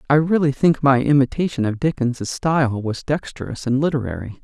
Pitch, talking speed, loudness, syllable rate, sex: 135 Hz, 160 wpm, -20 LUFS, 5.4 syllables/s, male